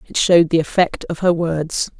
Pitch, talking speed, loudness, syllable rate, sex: 165 Hz, 210 wpm, -17 LUFS, 4.9 syllables/s, female